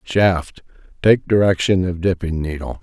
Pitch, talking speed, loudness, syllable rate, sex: 90 Hz, 125 wpm, -18 LUFS, 4.3 syllables/s, male